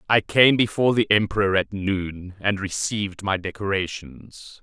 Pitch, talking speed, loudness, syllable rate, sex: 100 Hz, 145 wpm, -22 LUFS, 4.5 syllables/s, male